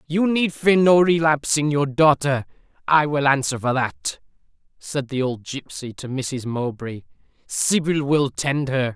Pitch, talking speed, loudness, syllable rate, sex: 140 Hz, 160 wpm, -20 LUFS, 4.2 syllables/s, male